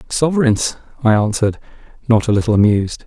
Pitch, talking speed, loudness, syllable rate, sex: 115 Hz, 135 wpm, -16 LUFS, 6.5 syllables/s, male